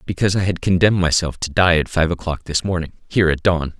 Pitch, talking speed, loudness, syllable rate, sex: 85 Hz, 235 wpm, -18 LUFS, 6.6 syllables/s, male